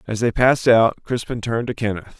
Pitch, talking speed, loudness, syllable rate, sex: 115 Hz, 220 wpm, -19 LUFS, 6.2 syllables/s, male